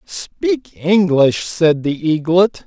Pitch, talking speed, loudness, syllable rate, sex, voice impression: 175 Hz, 115 wpm, -16 LUFS, 2.8 syllables/s, male, masculine, middle-aged, tensed, powerful, bright, halting, slightly raspy, friendly, unique, lively, intense